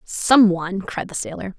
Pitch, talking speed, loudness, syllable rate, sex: 195 Hz, 190 wpm, -19 LUFS, 4.7 syllables/s, female